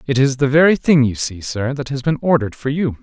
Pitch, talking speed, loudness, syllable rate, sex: 135 Hz, 280 wpm, -17 LUFS, 5.9 syllables/s, male